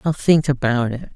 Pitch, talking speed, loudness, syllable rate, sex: 135 Hz, 205 wpm, -18 LUFS, 4.8 syllables/s, female